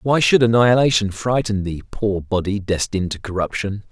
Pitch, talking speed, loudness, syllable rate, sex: 105 Hz, 155 wpm, -19 LUFS, 5.3 syllables/s, male